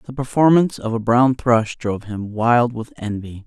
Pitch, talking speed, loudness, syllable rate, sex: 120 Hz, 190 wpm, -19 LUFS, 4.9 syllables/s, male